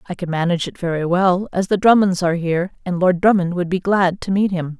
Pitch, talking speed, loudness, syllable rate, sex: 180 Hz, 250 wpm, -18 LUFS, 6.1 syllables/s, female